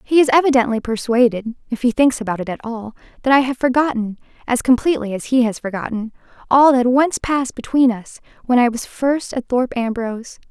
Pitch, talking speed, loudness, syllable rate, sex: 245 Hz, 195 wpm, -18 LUFS, 5.3 syllables/s, female